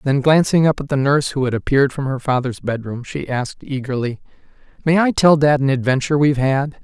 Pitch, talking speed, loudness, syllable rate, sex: 135 Hz, 210 wpm, -18 LUFS, 6.1 syllables/s, male